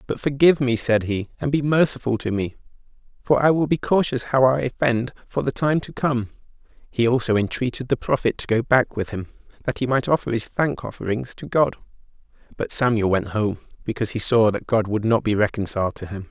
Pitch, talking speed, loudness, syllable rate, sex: 120 Hz, 210 wpm, -22 LUFS, 5.8 syllables/s, male